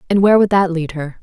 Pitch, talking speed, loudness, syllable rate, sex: 180 Hz, 295 wpm, -15 LUFS, 6.8 syllables/s, female